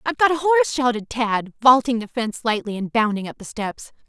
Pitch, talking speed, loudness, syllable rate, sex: 240 Hz, 220 wpm, -20 LUFS, 5.9 syllables/s, female